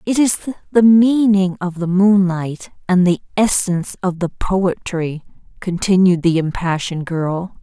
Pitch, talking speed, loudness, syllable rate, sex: 185 Hz, 135 wpm, -16 LUFS, 4.1 syllables/s, female